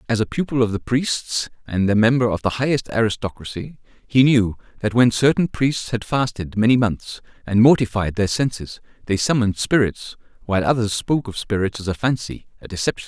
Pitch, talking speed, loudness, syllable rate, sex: 115 Hz, 185 wpm, -20 LUFS, 5.6 syllables/s, male